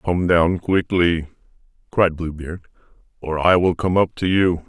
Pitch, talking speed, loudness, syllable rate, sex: 85 Hz, 165 wpm, -19 LUFS, 4.2 syllables/s, male